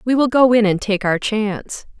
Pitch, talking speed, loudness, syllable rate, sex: 220 Hz, 240 wpm, -16 LUFS, 5.0 syllables/s, female